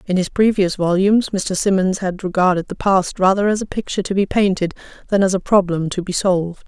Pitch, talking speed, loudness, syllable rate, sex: 190 Hz, 215 wpm, -18 LUFS, 5.8 syllables/s, female